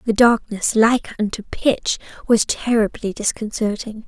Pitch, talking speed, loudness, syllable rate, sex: 220 Hz, 90 wpm, -19 LUFS, 4.3 syllables/s, female